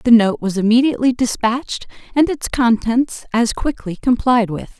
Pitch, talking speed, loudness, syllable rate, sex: 240 Hz, 150 wpm, -17 LUFS, 4.8 syllables/s, female